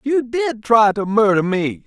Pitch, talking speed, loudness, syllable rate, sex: 210 Hz, 195 wpm, -17 LUFS, 4.0 syllables/s, male